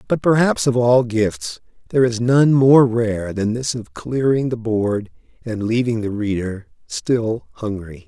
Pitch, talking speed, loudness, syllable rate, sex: 115 Hz, 165 wpm, -18 LUFS, 4.0 syllables/s, male